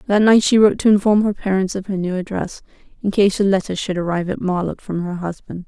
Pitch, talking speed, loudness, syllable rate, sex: 195 Hz, 245 wpm, -18 LUFS, 6.3 syllables/s, female